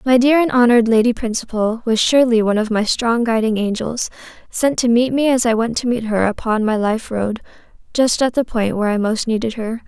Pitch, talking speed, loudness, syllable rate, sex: 230 Hz, 225 wpm, -17 LUFS, 5.7 syllables/s, female